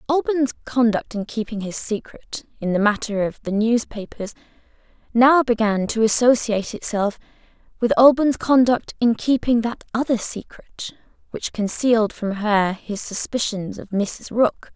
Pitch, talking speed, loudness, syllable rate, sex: 225 Hz, 140 wpm, -20 LUFS, 4.5 syllables/s, female